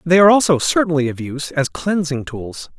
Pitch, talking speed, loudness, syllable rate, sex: 155 Hz, 195 wpm, -17 LUFS, 5.7 syllables/s, male